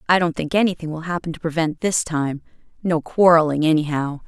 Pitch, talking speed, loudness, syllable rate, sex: 165 Hz, 170 wpm, -20 LUFS, 5.7 syllables/s, female